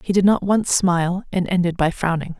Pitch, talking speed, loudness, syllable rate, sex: 180 Hz, 225 wpm, -19 LUFS, 5.4 syllables/s, female